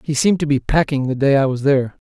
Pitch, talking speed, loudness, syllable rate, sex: 140 Hz, 290 wpm, -17 LUFS, 6.9 syllables/s, male